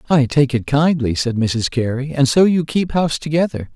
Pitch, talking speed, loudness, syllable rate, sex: 140 Hz, 210 wpm, -17 LUFS, 5.1 syllables/s, male